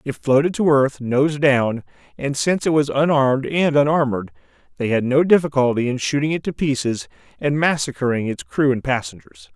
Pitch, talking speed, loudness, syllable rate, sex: 135 Hz, 175 wpm, -19 LUFS, 5.3 syllables/s, male